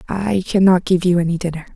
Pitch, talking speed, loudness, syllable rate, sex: 180 Hz, 205 wpm, -17 LUFS, 6.3 syllables/s, female